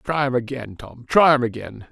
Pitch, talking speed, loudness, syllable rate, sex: 125 Hz, 220 wpm, -20 LUFS, 5.1 syllables/s, male